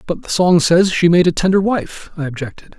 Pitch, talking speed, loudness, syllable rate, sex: 175 Hz, 235 wpm, -15 LUFS, 5.4 syllables/s, male